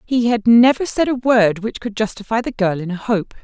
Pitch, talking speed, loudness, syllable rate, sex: 220 Hz, 245 wpm, -17 LUFS, 5.2 syllables/s, female